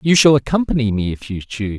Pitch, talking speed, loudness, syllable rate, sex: 125 Hz, 235 wpm, -17 LUFS, 6.3 syllables/s, male